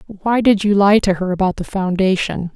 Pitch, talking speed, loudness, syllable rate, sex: 195 Hz, 210 wpm, -16 LUFS, 5.0 syllables/s, female